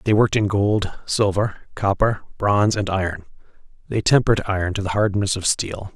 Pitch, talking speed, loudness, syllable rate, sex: 100 Hz, 170 wpm, -20 LUFS, 5.5 syllables/s, male